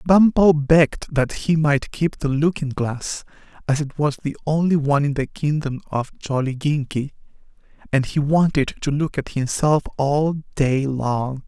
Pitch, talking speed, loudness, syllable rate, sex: 145 Hz, 155 wpm, -20 LUFS, 4.2 syllables/s, male